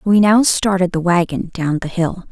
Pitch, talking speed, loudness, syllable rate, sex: 185 Hz, 205 wpm, -16 LUFS, 4.7 syllables/s, female